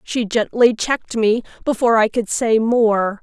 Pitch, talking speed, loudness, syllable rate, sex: 225 Hz, 165 wpm, -17 LUFS, 4.5 syllables/s, female